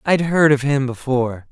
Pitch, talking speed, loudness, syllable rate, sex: 135 Hz, 240 wpm, -17 LUFS, 5.7 syllables/s, male